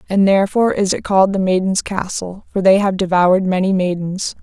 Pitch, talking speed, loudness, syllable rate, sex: 190 Hz, 190 wpm, -16 LUFS, 5.8 syllables/s, female